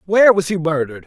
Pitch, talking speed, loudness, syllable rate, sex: 175 Hz, 225 wpm, -16 LUFS, 7.5 syllables/s, male